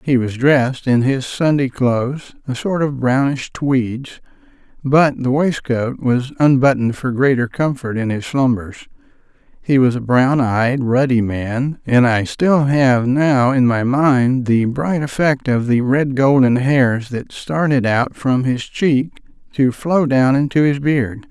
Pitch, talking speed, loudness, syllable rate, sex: 130 Hz, 165 wpm, -16 LUFS, 3.9 syllables/s, male